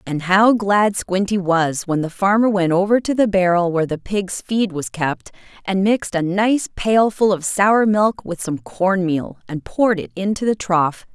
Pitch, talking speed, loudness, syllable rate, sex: 190 Hz, 200 wpm, -18 LUFS, 4.4 syllables/s, female